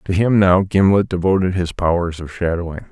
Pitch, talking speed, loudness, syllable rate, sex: 90 Hz, 185 wpm, -17 LUFS, 5.5 syllables/s, male